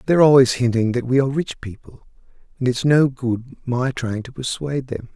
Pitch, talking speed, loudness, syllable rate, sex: 125 Hz, 200 wpm, -19 LUFS, 5.5 syllables/s, male